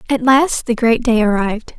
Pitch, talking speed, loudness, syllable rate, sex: 235 Hz, 200 wpm, -15 LUFS, 5.1 syllables/s, female